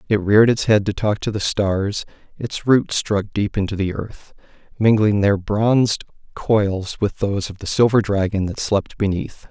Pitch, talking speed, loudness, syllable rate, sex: 105 Hz, 185 wpm, -19 LUFS, 4.5 syllables/s, male